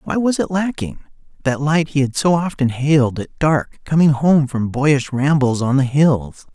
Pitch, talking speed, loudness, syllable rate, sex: 140 Hz, 195 wpm, -17 LUFS, 4.4 syllables/s, male